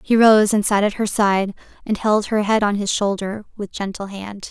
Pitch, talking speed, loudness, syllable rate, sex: 205 Hz, 225 wpm, -19 LUFS, 4.8 syllables/s, female